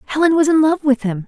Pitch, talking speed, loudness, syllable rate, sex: 285 Hz, 280 wpm, -15 LUFS, 6.5 syllables/s, female